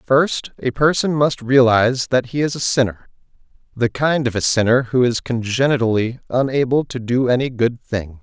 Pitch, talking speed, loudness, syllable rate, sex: 125 Hz, 175 wpm, -18 LUFS, 4.9 syllables/s, male